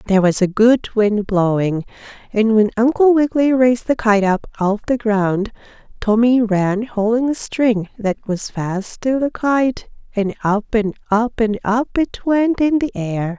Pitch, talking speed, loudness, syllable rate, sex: 225 Hz, 175 wpm, -17 LUFS, 4.2 syllables/s, female